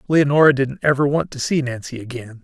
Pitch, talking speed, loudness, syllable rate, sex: 135 Hz, 195 wpm, -18 LUFS, 5.8 syllables/s, male